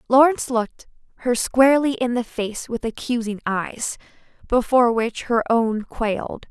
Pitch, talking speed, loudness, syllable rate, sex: 235 Hz, 140 wpm, -21 LUFS, 4.7 syllables/s, female